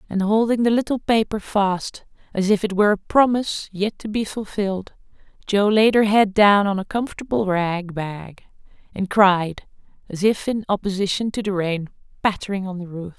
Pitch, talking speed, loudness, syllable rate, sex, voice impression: 200 Hz, 175 wpm, -20 LUFS, 5.0 syllables/s, female, very feminine, very adult-like, very thin, tensed, very powerful, bright, soft, very clear, fluent, cute, slightly cool, intellectual, refreshing, slightly sincere, calm, very friendly, very reassuring, unique, very elegant, slightly wild, very sweet, lively, kind, slightly modest, slightly light